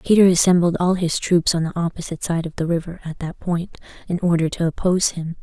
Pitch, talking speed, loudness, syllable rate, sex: 170 Hz, 220 wpm, -20 LUFS, 6.1 syllables/s, female